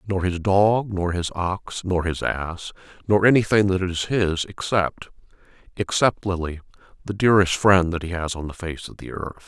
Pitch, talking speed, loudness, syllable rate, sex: 95 Hz, 175 wpm, -22 LUFS, 4.5 syllables/s, male